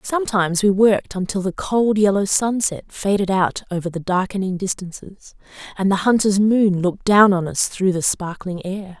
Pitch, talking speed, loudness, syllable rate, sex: 195 Hz, 175 wpm, -19 LUFS, 5.0 syllables/s, female